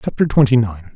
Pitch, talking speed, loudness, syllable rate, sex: 120 Hz, 190 wpm, -16 LUFS, 6.6 syllables/s, male